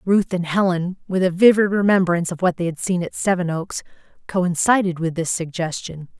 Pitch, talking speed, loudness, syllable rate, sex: 180 Hz, 185 wpm, -20 LUFS, 5.3 syllables/s, female